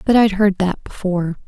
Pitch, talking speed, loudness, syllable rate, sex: 195 Hz, 205 wpm, -18 LUFS, 5.3 syllables/s, female